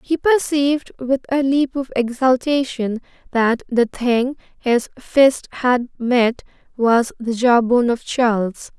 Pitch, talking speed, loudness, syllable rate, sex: 250 Hz, 130 wpm, -18 LUFS, 3.8 syllables/s, female